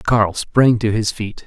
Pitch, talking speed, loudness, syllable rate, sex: 110 Hz, 205 wpm, -17 LUFS, 3.8 syllables/s, male